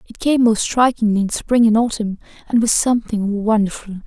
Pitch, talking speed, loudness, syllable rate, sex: 220 Hz, 175 wpm, -17 LUFS, 5.4 syllables/s, female